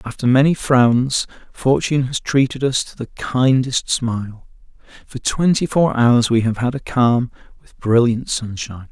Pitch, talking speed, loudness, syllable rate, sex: 125 Hz, 150 wpm, -17 LUFS, 4.4 syllables/s, male